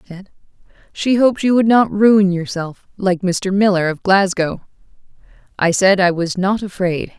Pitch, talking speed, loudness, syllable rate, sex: 190 Hz, 165 wpm, -16 LUFS, 4.6 syllables/s, female